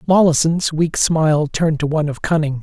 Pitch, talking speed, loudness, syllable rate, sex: 155 Hz, 185 wpm, -17 LUFS, 5.6 syllables/s, male